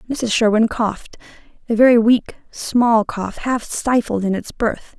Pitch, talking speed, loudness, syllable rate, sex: 225 Hz, 145 wpm, -17 LUFS, 4.1 syllables/s, female